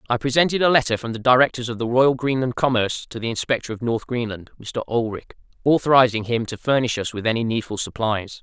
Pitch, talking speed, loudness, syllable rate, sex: 120 Hz, 205 wpm, -21 LUFS, 6.3 syllables/s, male